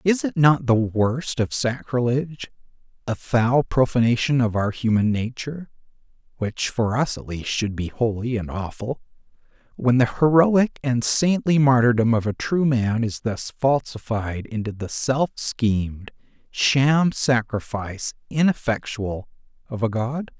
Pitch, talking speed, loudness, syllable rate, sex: 120 Hz, 140 wpm, -22 LUFS, 4.2 syllables/s, male